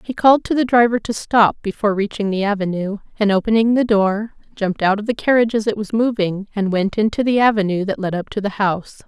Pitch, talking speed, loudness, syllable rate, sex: 210 Hz, 230 wpm, -18 LUFS, 6.1 syllables/s, female